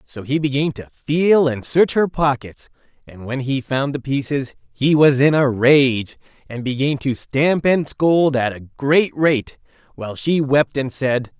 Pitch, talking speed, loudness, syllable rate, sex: 140 Hz, 185 wpm, -18 LUFS, 4.0 syllables/s, male